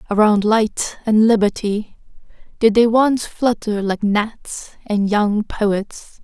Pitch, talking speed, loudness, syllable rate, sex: 215 Hz, 125 wpm, -17 LUFS, 3.3 syllables/s, female